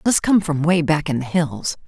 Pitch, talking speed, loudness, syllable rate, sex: 160 Hz, 255 wpm, -19 LUFS, 4.7 syllables/s, female